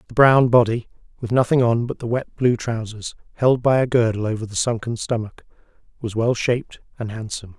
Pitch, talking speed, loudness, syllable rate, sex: 115 Hz, 190 wpm, -20 LUFS, 5.6 syllables/s, male